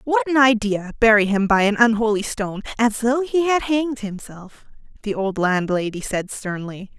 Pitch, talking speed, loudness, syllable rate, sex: 220 Hz, 170 wpm, -19 LUFS, 4.9 syllables/s, female